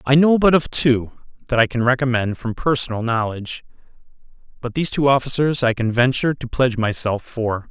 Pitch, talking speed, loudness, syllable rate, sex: 125 Hz, 180 wpm, -19 LUFS, 5.7 syllables/s, male